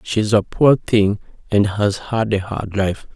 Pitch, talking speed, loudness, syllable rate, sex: 105 Hz, 190 wpm, -18 LUFS, 3.7 syllables/s, male